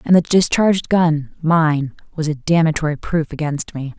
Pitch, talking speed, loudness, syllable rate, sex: 160 Hz, 165 wpm, -18 LUFS, 4.7 syllables/s, female